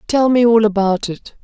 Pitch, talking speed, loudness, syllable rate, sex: 220 Hz, 210 wpm, -14 LUFS, 4.8 syllables/s, female